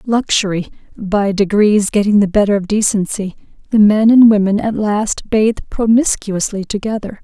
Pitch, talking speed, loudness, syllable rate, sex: 210 Hz, 140 wpm, -14 LUFS, 4.8 syllables/s, female